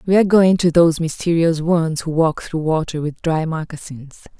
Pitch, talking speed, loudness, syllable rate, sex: 165 Hz, 190 wpm, -17 LUFS, 5.1 syllables/s, female